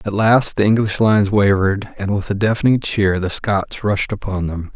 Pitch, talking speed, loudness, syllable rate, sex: 100 Hz, 200 wpm, -17 LUFS, 5.0 syllables/s, male